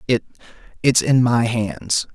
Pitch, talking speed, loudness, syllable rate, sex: 120 Hz, 110 wpm, -19 LUFS, 3.7 syllables/s, male